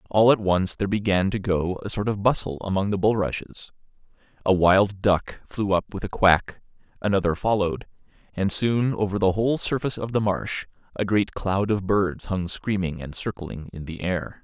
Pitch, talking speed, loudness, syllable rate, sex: 100 Hz, 185 wpm, -24 LUFS, 5.0 syllables/s, male